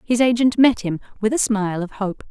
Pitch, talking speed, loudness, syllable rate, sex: 220 Hz, 235 wpm, -19 LUFS, 5.5 syllables/s, female